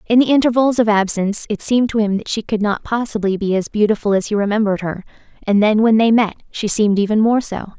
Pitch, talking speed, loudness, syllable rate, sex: 215 Hz, 240 wpm, -16 LUFS, 6.4 syllables/s, female